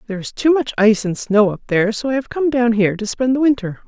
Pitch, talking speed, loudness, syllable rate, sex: 230 Hz, 295 wpm, -17 LUFS, 6.8 syllables/s, female